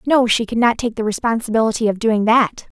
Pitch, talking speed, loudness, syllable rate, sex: 225 Hz, 215 wpm, -17 LUFS, 5.9 syllables/s, female